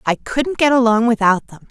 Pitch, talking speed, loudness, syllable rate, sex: 240 Hz, 210 wpm, -16 LUFS, 5.1 syllables/s, female